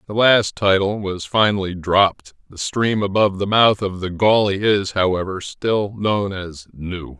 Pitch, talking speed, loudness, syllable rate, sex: 100 Hz, 165 wpm, -18 LUFS, 4.3 syllables/s, male